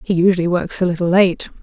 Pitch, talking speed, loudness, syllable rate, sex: 180 Hz, 220 wpm, -16 LUFS, 6.3 syllables/s, female